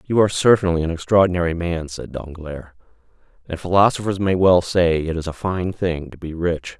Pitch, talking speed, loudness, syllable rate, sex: 85 Hz, 185 wpm, -19 LUFS, 5.5 syllables/s, male